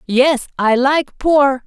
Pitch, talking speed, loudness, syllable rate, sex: 270 Hz, 145 wpm, -15 LUFS, 2.9 syllables/s, female